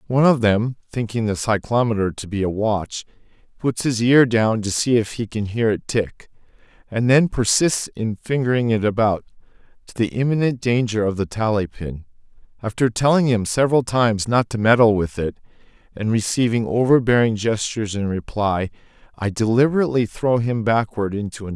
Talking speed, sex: 175 wpm, male